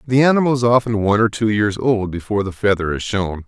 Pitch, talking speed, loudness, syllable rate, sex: 110 Hz, 240 wpm, -17 LUFS, 6.3 syllables/s, male